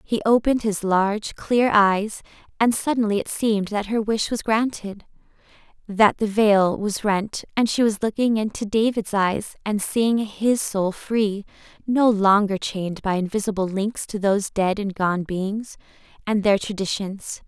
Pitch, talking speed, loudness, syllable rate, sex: 210 Hz, 160 wpm, -22 LUFS, 4.4 syllables/s, female